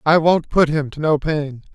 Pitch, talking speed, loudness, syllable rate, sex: 150 Hz, 240 wpm, -18 LUFS, 4.5 syllables/s, male